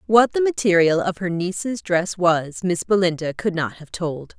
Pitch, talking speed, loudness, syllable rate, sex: 185 Hz, 190 wpm, -21 LUFS, 4.5 syllables/s, female